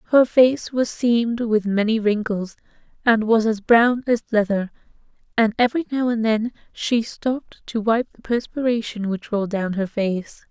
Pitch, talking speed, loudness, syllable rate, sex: 225 Hz, 165 wpm, -21 LUFS, 4.7 syllables/s, female